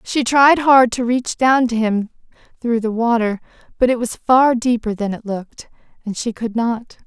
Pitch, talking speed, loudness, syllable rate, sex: 235 Hz, 195 wpm, -17 LUFS, 4.6 syllables/s, female